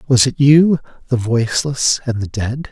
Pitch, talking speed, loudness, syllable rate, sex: 130 Hz, 175 wpm, -15 LUFS, 4.6 syllables/s, male